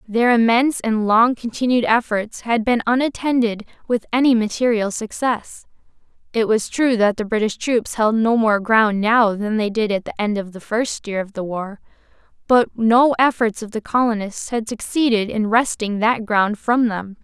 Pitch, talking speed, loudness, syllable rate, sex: 225 Hz, 180 wpm, -19 LUFS, 4.7 syllables/s, female